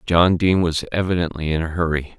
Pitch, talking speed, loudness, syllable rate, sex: 85 Hz, 195 wpm, -20 LUFS, 5.9 syllables/s, male